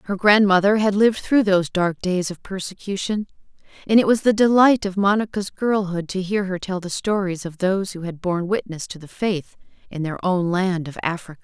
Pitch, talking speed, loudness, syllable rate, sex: 190 Hz, 205 wpm, -20 LUFS, 5.4 syllables/s, female